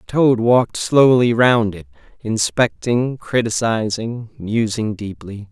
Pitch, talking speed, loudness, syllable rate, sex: 110 Hz, 100 wpm, -17 LUFS, 3.7 syllables/s, male